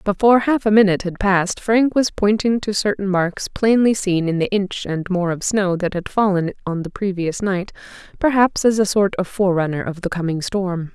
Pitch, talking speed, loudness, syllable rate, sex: 195 Hz, 210 wpm, -19 LUFS, 5.2 syllables/s, female